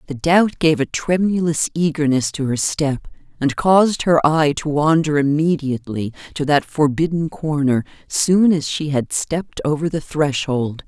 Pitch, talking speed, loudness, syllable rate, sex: 150 Hz, 155 wpm, -18 LUFS, 4.5 syllables/s, female